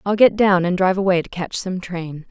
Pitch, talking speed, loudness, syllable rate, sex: 185 Hz, 260 wpm, -19 LUFS, 5.5 syllables/s, female